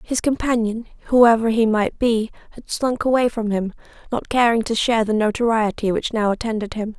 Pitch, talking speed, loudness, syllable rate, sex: 225 Hz, 180 wpm, -19 LUFS, 5.3 syllables/s, female